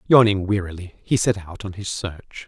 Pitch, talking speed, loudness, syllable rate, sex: 100 Hz, 195 wpm, -22 LUFS, 4.9 syllables/s, male